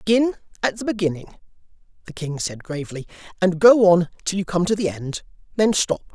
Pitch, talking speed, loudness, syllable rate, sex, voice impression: 185 Hz, 185 wpm, -21 LUFS, 5.6 syllables/s, male, slightly masculine, adult-like, slightly powerful, fluent, unique, slightly intense